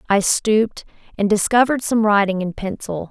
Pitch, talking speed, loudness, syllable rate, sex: 210 Hz, 155 wpm, -18 LUFS, 5.4 syllables/s, female